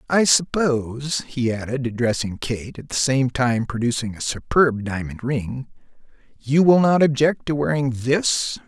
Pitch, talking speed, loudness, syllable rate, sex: 130 Hz, 150 wpm, -21 LUFS, 4.3 syllables/s, male